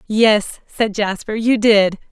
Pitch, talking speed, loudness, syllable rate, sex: 215 Hz, 140 wpm, -16 LUFS, 3.6 syllables/s, female